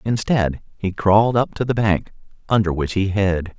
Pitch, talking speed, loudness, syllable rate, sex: 100 Hz, 185 wpm, -19 LUFS, 4.7 syllables/s, male